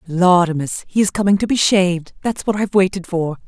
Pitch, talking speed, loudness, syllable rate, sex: 185 Hz, 205 wpm, -17 LUFS, 5.8 syllables/s, female